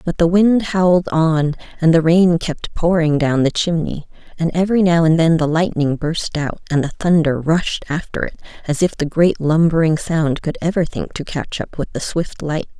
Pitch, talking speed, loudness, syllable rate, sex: 165 Hz, 205 wpm, -17 LUFS, 4.8 syllables/s, female